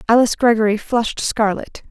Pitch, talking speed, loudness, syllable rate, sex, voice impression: 225 Hz, 125 wpm, -17 LUFS, 5.9 syllables/s, female, feminine, slightly adult-like, slightly friendly, slightly sweet, slightly kind